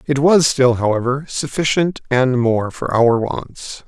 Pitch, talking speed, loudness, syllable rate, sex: 130 Hz, 155 wpm, -17 LUFS, 3.9 syllables/s, male